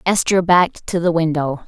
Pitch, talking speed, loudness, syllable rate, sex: 170 Hz, 180 wpm, -17 LUFS, 5.2 syllables/s, female